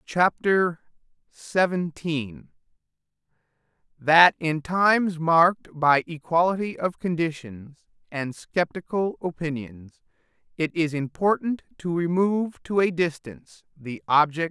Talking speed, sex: 110 wpm, male